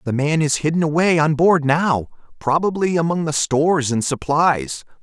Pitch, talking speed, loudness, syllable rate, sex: 155 Hz, 155 wpm, -18 LUFS, 4.7 syllables/s, male